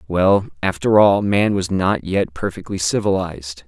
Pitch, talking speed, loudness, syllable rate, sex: 95 Hz, 145 wpm, -18 LUFS, 4.4 syllables/s, male